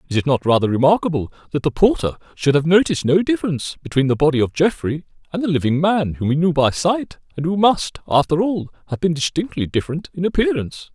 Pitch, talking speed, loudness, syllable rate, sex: 165 Hz, 210 wpm, -19 LUFS, 6.3 syllables/s, male